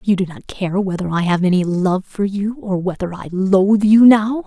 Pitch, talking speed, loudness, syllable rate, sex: 195 Hz, 230 wpm, -16 LUFS, 4.9 syllables/s, female